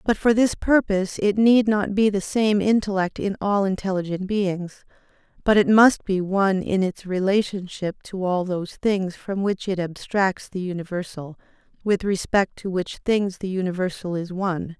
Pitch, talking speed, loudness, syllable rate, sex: 195 Hz, 170 wpm, -22 LUFS, 4.7 syllables/s, female